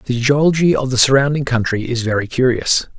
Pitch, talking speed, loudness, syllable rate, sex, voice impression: 130 Hz, 180 wpm, -15 LUFS, 5.5 syllables/s, male, masculine, middle-aged, relaxed, powerful, hard, muffled, raspy, mature, slightly friendly, wild, lively, strict, intense, slightly sharp